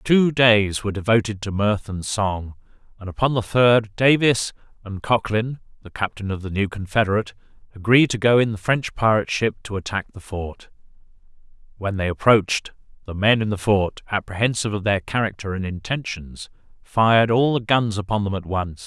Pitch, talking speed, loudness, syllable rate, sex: 105 Hz, 175 wpm, -21 LUFS, 5.3 syllables/s, male